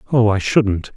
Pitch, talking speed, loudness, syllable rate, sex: 110 Hz, 190 wpm, -17 LUFS, 4.4 syllables/s, male